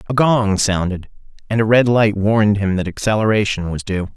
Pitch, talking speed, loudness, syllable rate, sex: 105 Hz, 190 wpm, -17 LUFS, 5.4 syllables/s, male